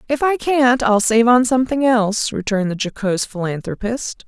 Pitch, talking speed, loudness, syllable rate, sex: 235 Hz, 170 wpm, -17 LUFS, 5.5 syllables/s, female